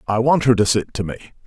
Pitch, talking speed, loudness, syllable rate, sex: 115 Hz, 285 wpm, -18 LUFS, 6.9 syllables/s, male